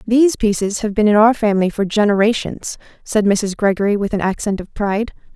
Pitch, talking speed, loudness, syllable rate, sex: 210 Hz, 190 wpm, -17 LUFS, 5.9 syllables/s, female